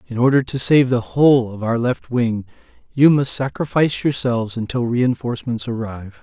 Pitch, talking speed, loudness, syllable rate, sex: 125 Hz, 165 wpm, -18 LUFS, 5.3 syllables/s, male